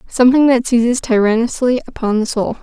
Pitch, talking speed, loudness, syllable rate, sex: 240 Hz, 160 wpm, -14 LUFS, 5.9 syllables/s, female